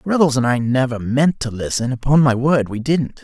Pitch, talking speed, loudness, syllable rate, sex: 130 Hz, 220 wpm, -17 LUFS, 5.1 syllables/s, male